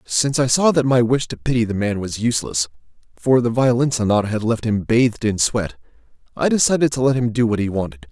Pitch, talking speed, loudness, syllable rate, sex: 115 Hz, 230 wpm, -19 LUFS, 6.1 syllables/s, male